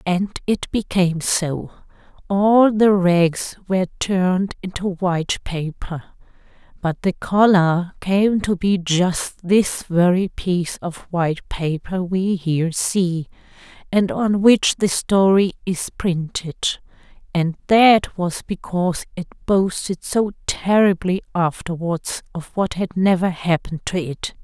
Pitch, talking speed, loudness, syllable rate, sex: 185 Hz, 125 wpm, -19 LUFS, 3.8 syllables/s, female